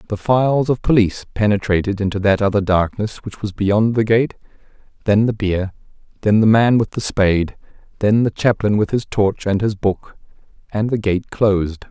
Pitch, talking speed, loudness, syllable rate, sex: 105 Hz, 180 wpm, -17 LUFS, 5.1 syllables/s, male